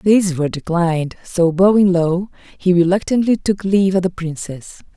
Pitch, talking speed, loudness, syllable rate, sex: 180 Hz, 155 wpm, -16 LUFS, 5.1 syllables/s, female